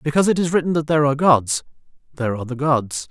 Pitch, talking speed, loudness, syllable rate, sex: 145 Hz, 215 wpm, -19 LUFS, 7.7 syllables/s, male